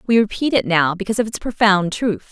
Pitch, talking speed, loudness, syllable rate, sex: 210 Hz, 235 wpm, -18 LUFS, 6.0 syllables/s, female